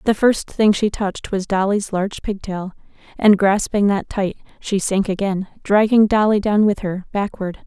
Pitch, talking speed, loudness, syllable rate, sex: 200 Hz, 180 wpm, -18 LUFS, 4.7 syllables/s, female